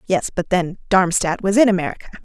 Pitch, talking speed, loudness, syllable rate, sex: 185 Hz, 190 wpm, -18 LUFS, 6.1 syllables/s, female